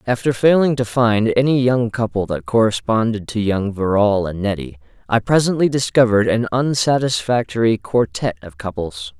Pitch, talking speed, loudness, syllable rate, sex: 110 Hz, 145 wpm, -18 LUFS, 5.1 syllables/s, male